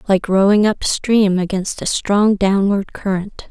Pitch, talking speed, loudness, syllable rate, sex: 200 Hz, 135 wpm, -16 LUFS, 3.9 syllables/s, female